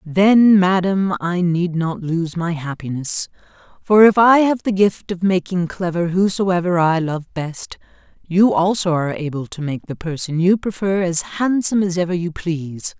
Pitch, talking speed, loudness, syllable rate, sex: 180 Hz, 170 wpm, -18 LUFS, 4.5 syllables/s, female